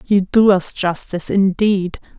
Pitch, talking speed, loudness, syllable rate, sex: 190 Hz, 135 wpm, -16 LUFS, 4.2 syllables/s, female